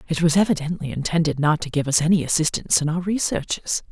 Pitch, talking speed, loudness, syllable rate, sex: 165 Hz, 200 wpm, -21 LUFS, 6.5 syllables/s, female